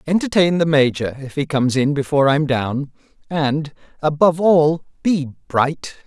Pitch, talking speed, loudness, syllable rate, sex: 150 Hz, 150 wpm, -18 LUFS, 4.8 syllables/s, male